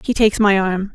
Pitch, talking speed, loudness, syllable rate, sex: 200 Hz, 255 wpm, -16 LUFS, 5.9 syllables/s, female